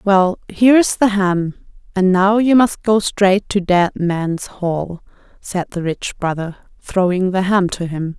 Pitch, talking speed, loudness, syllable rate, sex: 190 Hz, 175 wpm, -16 LUFS, 3.9 syllables/s, female